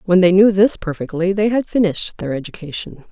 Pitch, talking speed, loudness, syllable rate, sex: 190 Hz, 195 wpm, -17 LUFS, 5.8 syllables/s, female